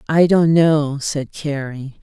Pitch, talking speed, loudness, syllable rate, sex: 150 Hz, 150 wpm, -17 LUFS, 3.3 syllables/s, female